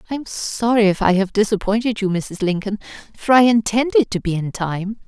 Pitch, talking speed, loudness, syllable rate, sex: 210 Hz, 200 wpm, -18 LUFS, 5.4 syllables/s, female